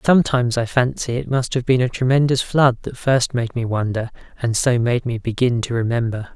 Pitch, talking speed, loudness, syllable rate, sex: 125 Hz, 210 wpm, -19 LUFS, 5.4 syllables/s, male